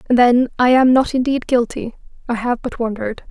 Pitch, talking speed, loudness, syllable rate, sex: 245 Hz, 200 wpm, -16 LUFS, 5.4 syllables/s, female